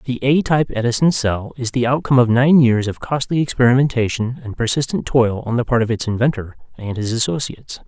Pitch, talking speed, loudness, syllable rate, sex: 125 Hz, 200 wpm, -17 LUFS, 6.0 syllables/s, male